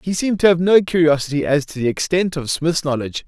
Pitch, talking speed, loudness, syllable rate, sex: 160 Hz, 240 wpm, -17 LUFS, 6.3 syllables/s, male